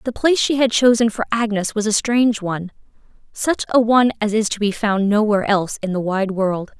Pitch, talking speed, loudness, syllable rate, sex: 215 Hz, 210 wpm, -18 LUFS, 5.8 syllables/s, female